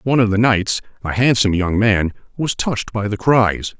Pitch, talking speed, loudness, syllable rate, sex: 110 Hz, 205 wpm, -17 LUFS, 5.2 syllables/s, male